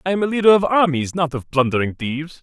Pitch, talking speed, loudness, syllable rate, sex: 160 Hz, 250 wpm, -18 LUFS, 6.5 syllables/s, male